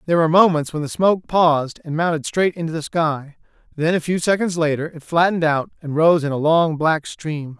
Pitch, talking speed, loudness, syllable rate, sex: 160 Hz, 220 wpm, -19 LUFS, 5.6 syllables/s, male